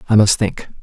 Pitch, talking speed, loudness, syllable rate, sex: 105 Hz, 220 wpm, -16 LUFS, 5.5 syllables/s, male